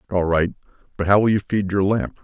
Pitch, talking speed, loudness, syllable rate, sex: 95 Hz, 240 wpm, -20 LUFS, 6.0 syllables/s, male